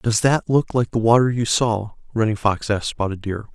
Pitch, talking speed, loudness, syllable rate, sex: 115 Hz, 220 wpm, -20 LUFS, 5.3 syllables/s, male